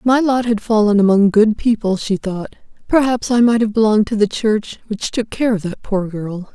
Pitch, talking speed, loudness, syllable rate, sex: 215 Hz, 230 wpm, -16 LUFS, 5.2 syllables/s, female